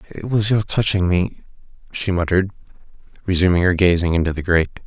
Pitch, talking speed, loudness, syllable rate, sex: 90 Hz, 160 wpm, -19 LUFS, 6.2 syllables/s, male